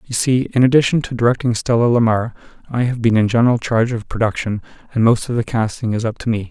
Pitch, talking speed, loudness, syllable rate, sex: 115 Hz, 230 wpm, -17 LUFS, 6.5 syllables/s, male